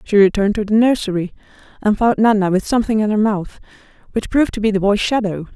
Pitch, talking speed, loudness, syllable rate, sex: 210 Hz, 215 wpm, -17 LUFS, 6.6 syllables/s, female